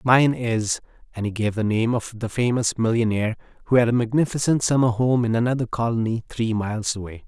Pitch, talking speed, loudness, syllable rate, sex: 115 Hz, 190 wpm, -22 LUFS, 5.8 syllables/s, male